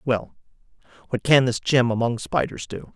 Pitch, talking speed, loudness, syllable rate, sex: 120 Hz, 165 wpm, -22 LUFS, 4.8 syllables/s, male